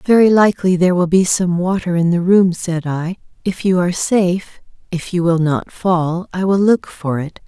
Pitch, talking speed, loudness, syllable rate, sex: 180 Hz, 210 wpm, -16 LUFS, 4.8 syllables/s, female